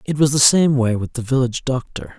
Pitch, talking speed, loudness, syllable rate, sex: 130 Hz, 245 wpm, -17 LUFS, 5.7 syllables/s, male